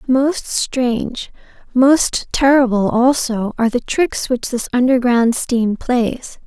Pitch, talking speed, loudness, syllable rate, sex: 245 Hz, 120 wpm, -16 LUFS, 3.4 syllables/s, female